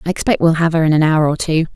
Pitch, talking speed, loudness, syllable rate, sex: 160 Hz, 340 wpm, -15 LUFS, 7.1 syllables/s, female